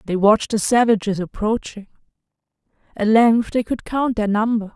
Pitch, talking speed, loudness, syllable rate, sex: 215 Hz, 150 wpm, -18 LUFS, 5.2 syllables/s, female